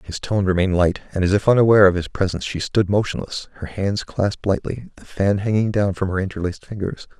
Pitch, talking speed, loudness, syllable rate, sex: 95 Hz, 215 wpm, -20 LUFS, 6.3 syllables/s, male